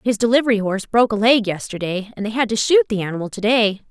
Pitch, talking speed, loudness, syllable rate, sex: 220 Hz, 245 wpm, -18 LUFS, 6.9 syllables/s, female